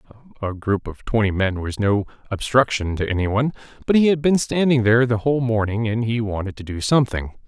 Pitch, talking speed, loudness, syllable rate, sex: 115 Hz, 200 wpm, -20 LUFS, 6.3 syllables/s, male